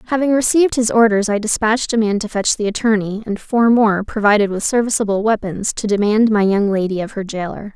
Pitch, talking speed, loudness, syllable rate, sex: 215 Hz, 210 wpm, -16 LUFS, 5.9 syllables/s, female